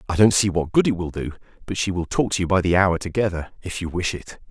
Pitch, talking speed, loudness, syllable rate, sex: 90 Hz, 295 wpm, -22 LUFS, 6.3 syllables/s, male